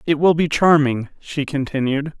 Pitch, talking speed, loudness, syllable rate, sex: 145 Hz, 165 wpm, -18 LUFS, 4.7 syllables/s, male